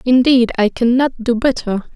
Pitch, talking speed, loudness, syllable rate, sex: 240 Hz, 185 wpm, -15 LUFS, 4.8 syllables/s, female